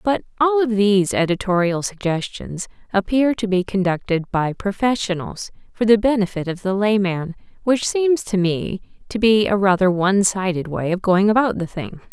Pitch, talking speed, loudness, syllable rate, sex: 200 Hz, 170 wpm, -19 LUFS, 4.9 syllables/s, female